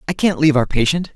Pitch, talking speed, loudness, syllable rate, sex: 150 Hz, 260 wpm, -16 LUFS, 7.5 syllables/s, male